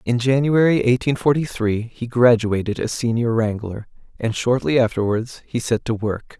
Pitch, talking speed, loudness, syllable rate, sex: 120 Hz, 160 wpm, -20 LUFS, 4.7 syllables/s, male